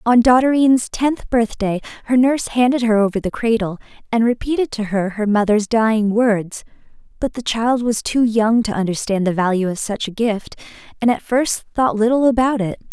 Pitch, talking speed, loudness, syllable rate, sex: 225 Hz, 185 wpm, -18 LUFS, 5.2 syllables/s, female